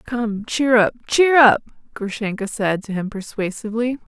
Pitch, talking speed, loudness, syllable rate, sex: 225 Hz, 145 wpm, -19 LUFS, 4.7 syllables/s, female